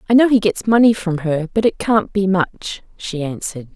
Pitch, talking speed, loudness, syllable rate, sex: 195 Hz, 225 wpm, -17 LUFS, 5.1 syllables/s, female